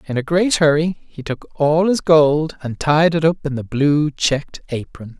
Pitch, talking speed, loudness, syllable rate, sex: 150 Hz, 210 wpm, -17 LUFS, 4.4 syllables/s, male